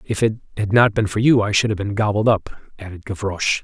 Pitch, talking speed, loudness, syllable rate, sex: 105 Hz, 250 wpm, -19 LUFS, 6.0 syllables/s, male